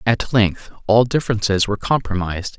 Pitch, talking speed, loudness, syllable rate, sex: 110 Hz, 140 wpm, -18 LUFS, 5.6 syllables/s, male